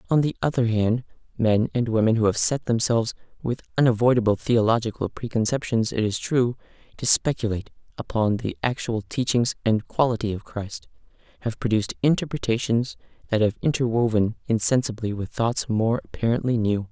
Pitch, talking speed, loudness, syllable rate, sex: 115 Hz, 140 wpm, -23 LUFS, 5.5 syllables/s, male